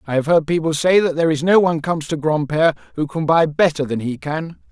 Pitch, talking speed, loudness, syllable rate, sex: 155 Hz, 255 wpm, -18 LUFS, 6.3 syllables/s, male